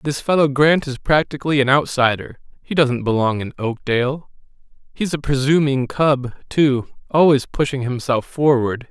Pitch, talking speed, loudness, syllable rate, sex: 135 Hz, 135 wpm, -18 LUFS, 4.8 syllables/s, male